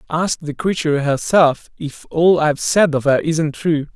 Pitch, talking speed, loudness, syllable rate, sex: 155 Hz, 180 wpm, -17 LUFS, 4.5 syllables/s, male